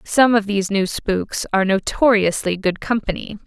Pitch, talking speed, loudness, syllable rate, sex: 205 Hz, 155 wpm, -19 LUFS, 4.9 syllables/s, female